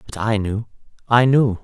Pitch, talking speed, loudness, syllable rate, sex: 110 Hz, 185 wpm, -18 LUFS, 4.5 syllables/s, male